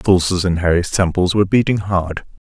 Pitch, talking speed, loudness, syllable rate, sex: 95 Hz, 195 wpm, -16 LUFS, 5.8 syllables/s, male